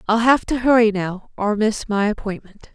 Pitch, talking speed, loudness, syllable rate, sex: 215 Hz, 195 wpm, -19 LUFS, 4.7 syllables/s, female